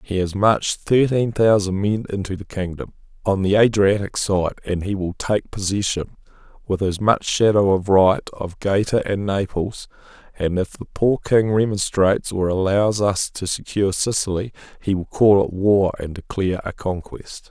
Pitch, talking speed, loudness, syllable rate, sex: 100 Hz, 170 wpm, -20 LUFS, 4.7 syllables/s, male